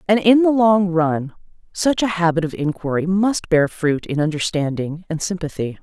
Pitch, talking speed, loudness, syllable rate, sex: 175 Hz, 175 wpm, -19 LUFS, 4.8 syllables/s, female